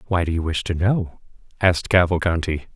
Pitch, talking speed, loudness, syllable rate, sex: 90 Hz, 175 wpm, -21 LUFS, 5.6 syllables/s, male